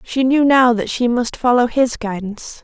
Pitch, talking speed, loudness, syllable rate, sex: 240 Hz, 205 wpm, -16 LUFS, 4.7 syllables/s, female